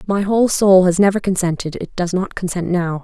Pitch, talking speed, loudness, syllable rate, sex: 185 Hz, 220 wpm, -17 LUFS, 5.5 syllables/s, female